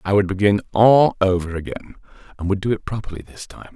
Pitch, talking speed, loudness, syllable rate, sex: 100 Hz, 210 wpm, -19 LUFS, 6.0 syllables/s, male